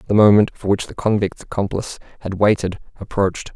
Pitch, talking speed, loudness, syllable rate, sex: 100 Hz, 170 wpm, -19 LUFS, 6.2 syllables/s, male